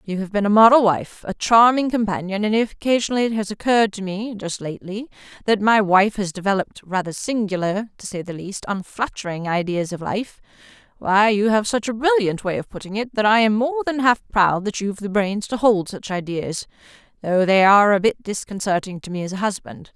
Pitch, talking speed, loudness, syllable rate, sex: 205 Hz, 200 wpm, -20 LUFS, 5.7 syllables/s, female